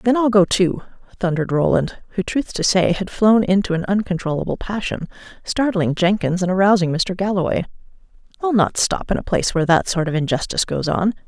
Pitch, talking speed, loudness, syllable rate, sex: 190 Hz, 185 wpm, -19 LUFS, 5.8 syllables/s, female